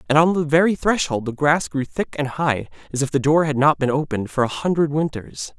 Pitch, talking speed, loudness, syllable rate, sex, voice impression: 150 Hz, 245 wpm, -20 LUFS, 5.7 syllables/s, male, masculine, adult-like, slightly relaxed, powerful, soft, slightly muffled, slightly raspy, cool, intellectual, sincere, friendly, wild, lively